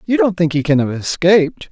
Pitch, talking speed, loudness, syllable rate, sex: 165 Hz, 245 wpm, -15 LUFS, 5.6 syllables/s, male